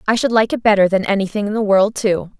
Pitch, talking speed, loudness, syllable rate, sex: 205 Hz, 275 wpm, -16 LUFS, 6.4 syllables/s, female